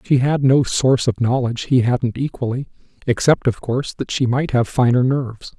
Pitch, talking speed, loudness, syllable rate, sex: 125 Hz, 185 wpm, -18 LUFS, 5.3 syllables/s, male